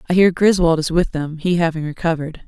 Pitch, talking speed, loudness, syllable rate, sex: 165 Hz, 220 wpm, -18 LUFS, 6.1 syllables/s, female